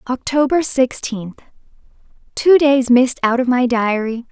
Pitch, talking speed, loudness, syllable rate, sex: 250 Hz, 110 wpm, -15 LUFS, 4.4 syllables/s, female